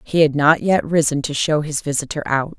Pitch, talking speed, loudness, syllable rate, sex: 150 Hz, 230 wpm, -18 LUFS, 5.3 syllables/s, female